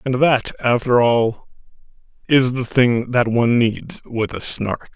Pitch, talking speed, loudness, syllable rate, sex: 120 Hz, 155 wpm, -18 LUFS, 3.7 syllables/s, male